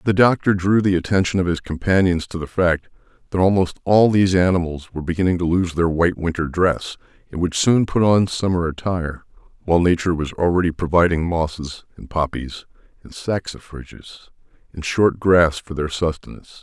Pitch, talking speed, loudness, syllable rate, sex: 90 Hz, 170 wpm, -19 LUFS, 5.6 syllables/s, male